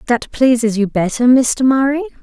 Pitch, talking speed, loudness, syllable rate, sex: 250 Hz, 160 wpm, -14 LUFS, 4.7 syllables/s, female